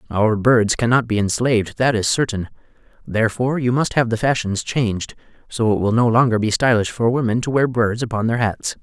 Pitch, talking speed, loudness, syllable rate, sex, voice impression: 115 Hz, 205 wpm, -18 LUFS, 5.6 syllables/s, male, masculine, adult-like, tensed, slightly powerful, hard, clear, fluent, cool, intellectual, slightly refreshing, friendly, wild, lively, slightly light